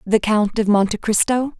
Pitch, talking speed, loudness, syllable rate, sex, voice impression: 215 Hz, 190 wpm, -18 LUFS, 4.9 syllables/s, female, feminine, adult-like, slightly fluent, slightly intellectual, slightly elegant